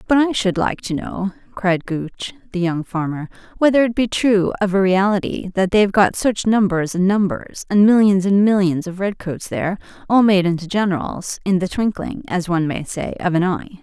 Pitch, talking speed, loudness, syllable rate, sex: 195 Hz, 205 wpm, -18 LUFS, 5.1 syllables/s, female